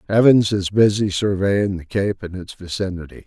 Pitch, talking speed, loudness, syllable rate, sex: 95 Hz, 165 wpm, -19 LUFS, 4.9 syllables/s, male